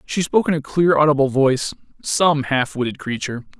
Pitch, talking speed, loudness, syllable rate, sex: 145 Hz, 185 wpm, -19 LUFS, 5.8 syllables/s, male